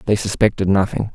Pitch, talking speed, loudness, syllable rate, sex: 100 Hz, 155 wpm, -18 LUFS, 6.1 syllables/s, male